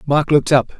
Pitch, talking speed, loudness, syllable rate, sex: 140 Hz, 230 wpm, -15 LUFS, 6.2 syllables/s, male